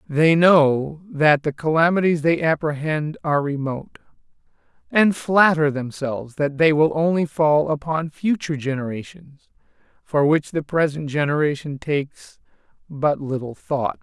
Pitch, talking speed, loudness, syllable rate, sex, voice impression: 150 Hz, 125 wpm, -20 LUFS, 4.5 syllables/s, male, masculine, adult-like, slightly powerful, slightly halting, friendly, unique, slightly wild, lively, slightly intense, slightly sharp